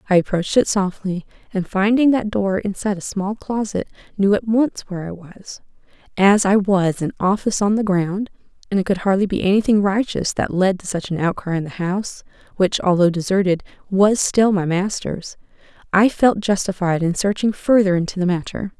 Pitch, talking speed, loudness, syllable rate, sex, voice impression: 195 Hz, 190 wpm, -19 LUFS, 5.3 syllables/s, female, very feminine, young, slightly adult-like, very thin, slightly relaxed, slightly weak, very bright, soft, clear, fluent, very cute, intellectual, very refreshing, sincere, calm, friendly, reassuring, unique, elegant, slightly wild, sweet, lively, kind, slightly intense, slightly sharp, slightly light